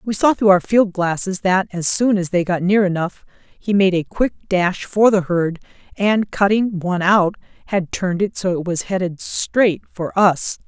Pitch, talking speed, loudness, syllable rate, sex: 190 Hz, 200 wpm, -18 LUFS, 4.5 syllables/s, female